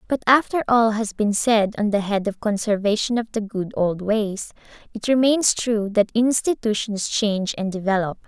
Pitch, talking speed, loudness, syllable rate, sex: 215 Hz, 175 wpm, -21 LUFS, 4.7 syllables/s, female